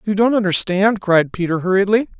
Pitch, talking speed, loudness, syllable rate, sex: 195 Hz, 165 wpm, -16 LUFS, 5.5 syllables/s, male